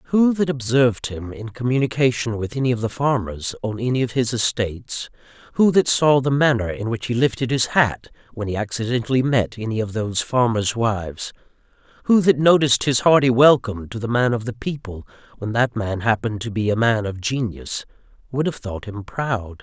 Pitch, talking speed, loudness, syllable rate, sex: 120 Hz, 185 wpm, -20 LUFS, 5.4 syllables/s, male